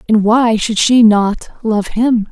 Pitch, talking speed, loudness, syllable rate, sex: 220 Hz, 155 wpm, -13 LUFS, 3.5 syllables/s, female